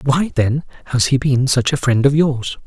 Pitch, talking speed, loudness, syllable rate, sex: 135 Hz, 225 wpm, -17 LUFS, 4.6 syllables/s, male